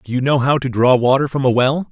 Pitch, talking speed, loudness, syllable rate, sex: 130 Hz, 315 wpm, -15 LUFS, 6.2 syllables/s, male